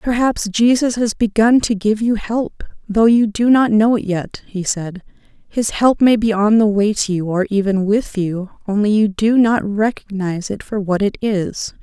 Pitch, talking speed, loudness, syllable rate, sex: 210 Hz, 205 wpm, -16 LUFS, 4.4 syllables/s, female